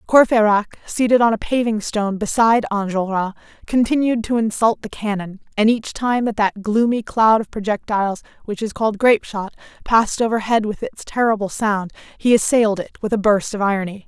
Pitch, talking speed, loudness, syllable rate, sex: 215 Hz, 175 wpm, -18 LUFS, 5.6 syllables/s, female